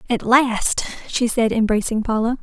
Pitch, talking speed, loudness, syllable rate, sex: 230 Hz, 150 wpm, -19 LUFS, 4.6 syllables/s, female